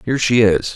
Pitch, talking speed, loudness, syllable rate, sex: 110 Hz, 235 wpm, -15 LUFS, 6.2 syllables/s, male